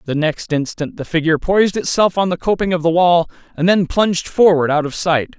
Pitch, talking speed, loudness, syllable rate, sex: 170 Hz, 225 wpm, -16 LUFS, 5.7 syllables/s, male